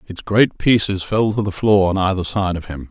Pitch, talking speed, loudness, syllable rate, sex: 100 Hz, 250 wpm, -18 LUFS, 5.1 syllables/s, male